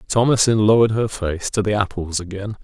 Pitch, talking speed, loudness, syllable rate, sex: 105 Hz, 185 wpm, -19 LUFS, 5.7 syllables/s, male